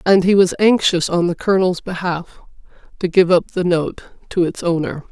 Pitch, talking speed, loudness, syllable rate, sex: 180 Hz, 190 wpm, -17 LUFS, 5.2 syllables/s, female